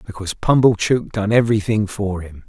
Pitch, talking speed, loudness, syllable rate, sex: 105 Hz, 145 wpm, -18 LUFS, 5.6 syllables/s, male